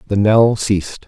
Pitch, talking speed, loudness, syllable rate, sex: 100 Hz, 165 wpm, -15 LUFS, 4.6 syllables/s, male